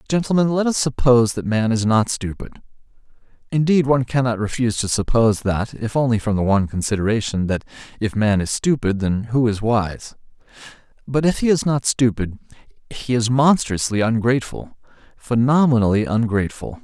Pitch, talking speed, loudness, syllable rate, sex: 120 Hz, 155 wpm, -19 LUFS, 5.1 syllables/s, male